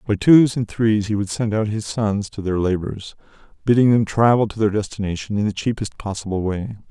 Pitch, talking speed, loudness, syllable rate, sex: 105 Hz, 210 wpm, -20 LUFS, 5.4 syllables/s, male